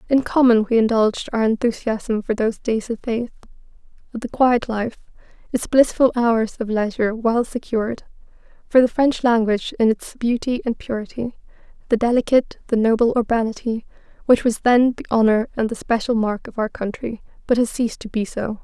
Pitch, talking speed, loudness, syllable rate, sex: 230 Hz, 175 wpm, -20 LUFS, 5.4 syllables/s, female